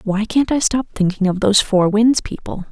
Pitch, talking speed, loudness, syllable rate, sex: 210 Hz, 220 wpm, -16 LUFS, 5.2 syllables/s, female